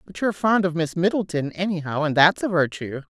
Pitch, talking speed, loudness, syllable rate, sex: 175 Hz, 210 wpm, -22 LUFS, 5.8 syllables/s, female